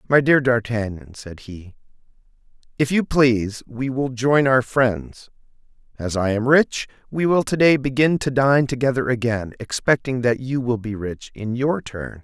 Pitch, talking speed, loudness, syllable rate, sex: 125 Hz, 165 wpm, -20 LUFS, 4.4 syllables/s, male